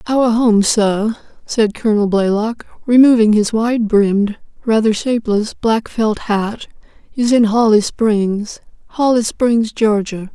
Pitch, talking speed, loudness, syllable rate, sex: 220 Hz, 120 wpm, -15 LUFS, 3.9 syllables/s, female